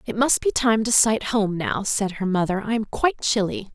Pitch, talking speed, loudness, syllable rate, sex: 215 Hz, 240 wpm, -21 LUFS, 5.0 syllables/s, female